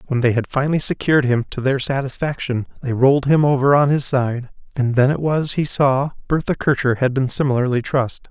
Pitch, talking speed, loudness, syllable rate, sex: 135 Hz, 200 wpm, -18 LUFS, 5.7 syllables/s, male